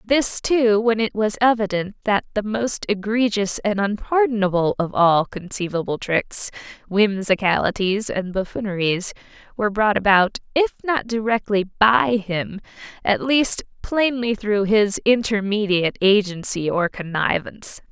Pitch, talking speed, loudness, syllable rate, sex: 210 Hz, 120 wpm, -20 LUFS, 4.3 syllables/s, female